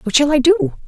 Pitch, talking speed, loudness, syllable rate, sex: 255 Hz, 275 wpm, -15 LUFS, 5.6 syllables/s, female